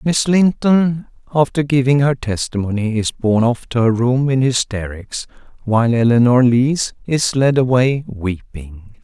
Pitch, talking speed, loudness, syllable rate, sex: 125 Hz, 140 wpm, -16 LUFS, 4.3 syllables/s, male